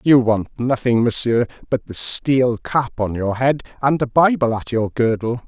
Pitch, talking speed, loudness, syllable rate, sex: 120 Hz, 185 wpm, -18 LUFS, 4.3 syllables/s, male